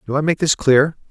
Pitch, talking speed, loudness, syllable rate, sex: 145 Hz, 270 wpm, -16 LUFS, 5.8 syllables/s, male